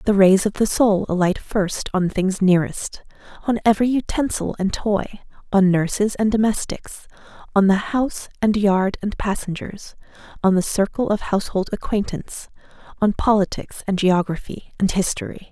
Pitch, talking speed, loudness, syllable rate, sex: 200 Hz, 145 wpm, -20 LUFS, 5.1 syllables/s, female